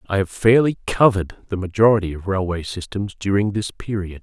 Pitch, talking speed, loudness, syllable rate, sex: 100 Hz, 170 wpm, -20 LUFS, 5.7 syllables/s, male